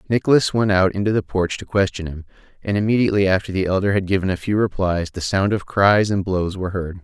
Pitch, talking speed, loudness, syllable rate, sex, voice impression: 95 Hz, 230 wpm, -19 LUFS, 6.2 syllables/s, male, masculine, adult-like, clear, fluent, cool, intellectual, slightly mature, wild, slightly strict, slightly sharp